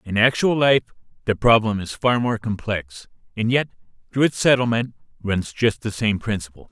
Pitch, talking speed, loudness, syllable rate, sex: 110 Hz, 170 wpm, -21 LUFS, 5.0 syllables/s, male